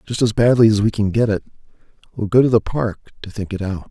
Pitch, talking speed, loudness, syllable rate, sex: 110 Hz, 260 wpm, -18 LUFS, 6.3 syllables/s, male